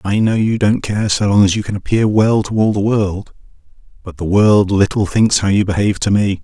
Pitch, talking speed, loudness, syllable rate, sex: 100 Hz, 235 wpm, -14 LUFS, 5.3 syllables/s, male